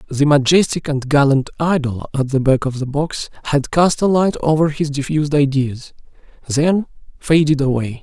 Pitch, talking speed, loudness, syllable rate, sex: 145 Hz, 165 wpm, -17 LUFS, 4.8 syllables/s, male